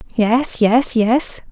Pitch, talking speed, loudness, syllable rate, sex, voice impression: 235 Hz, 120 wpm, -16 LUFS, 2.7 syllables/s, female, feminine, adult-like, slightly dark, muffled, fluent, slightly intellectual, calm, slightly elegant, modest